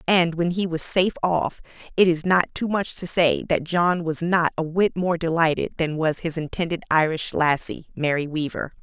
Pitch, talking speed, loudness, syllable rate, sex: 165 Hz, 195 wpm, -22 LUFS, 4.9 syllables/s, female